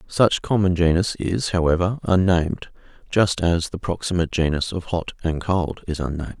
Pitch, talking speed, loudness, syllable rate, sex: 85 Hz, 160 wpm, -21 LUFS, 5.1 syllables/s, male